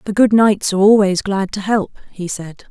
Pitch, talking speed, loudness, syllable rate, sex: 200 Hz, 220 wpm, -15 LUFS, 5.1 syllables/s, female